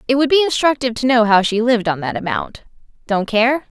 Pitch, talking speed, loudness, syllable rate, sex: 240 Hz, 220 wpm, -16 LUFS, 6.1 syllables/s, female